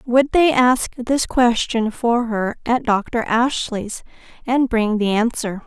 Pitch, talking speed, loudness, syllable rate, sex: 235 Hz, 150 wpm, -18 LUFS, 3.4 syllables/s, female